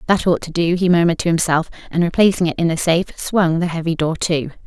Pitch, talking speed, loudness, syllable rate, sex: 170 Hz, 245 wpm, -18 LUFS, 6.5 syllables/s, female